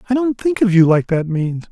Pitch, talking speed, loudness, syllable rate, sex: 200 Hz, 280 wpm, -16 LUFS, 5.4 syllables/s, male